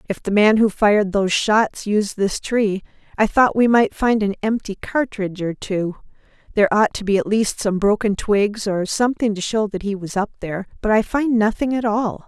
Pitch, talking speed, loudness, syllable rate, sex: 210 Hz, 215 wpm, -19 LUFS, 5.1 syllables/s, female